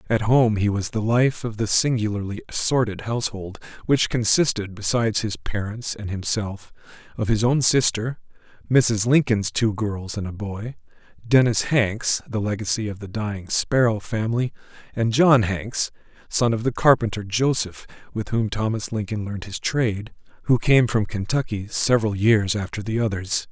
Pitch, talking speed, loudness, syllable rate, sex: 110 Hz, 155 wpm, -22 LUFS, 4.1 syllables/s, male